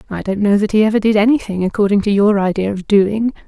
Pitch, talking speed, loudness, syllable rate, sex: 205 Hz, 240 wpm, -15 LUFS, 6.3 syllables/s, female